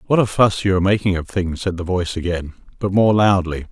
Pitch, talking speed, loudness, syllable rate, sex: 95 Hz, 240 wpm, -18 LUFS, 6.1 syllables/s, male